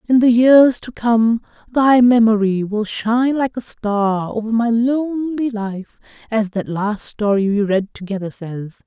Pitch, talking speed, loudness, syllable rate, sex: 225 Hz, 160 wpm, -17 LUFS, 4.1 syllables/s, female